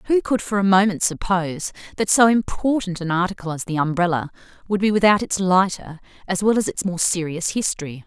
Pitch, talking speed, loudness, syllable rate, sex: 185 Hz, 195 wpm, -20 LUFS, 5.7 syllables/s, female